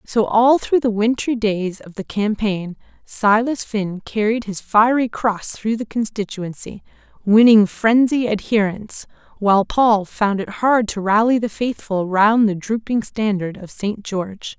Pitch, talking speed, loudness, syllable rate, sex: 215 Hz, 150 wpm, -18 LUFS, 4.1 syllables/s, female